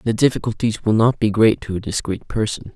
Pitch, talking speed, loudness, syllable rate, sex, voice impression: 110 Hz, 220 wpm, -19 LUFS, 5.5 syllables/s, male, very masculine, slightly adult-like, thick, slightly relaxed, slightly powerful, bright, slightly soft, clear, fluent, slightly raspy, cool, intellectual, very refreshing, slightly sincere, calm, friendly, reassuring, slightly unique, slightly elegant, wild, slightly sweet, lively, kind, intense, slightly modest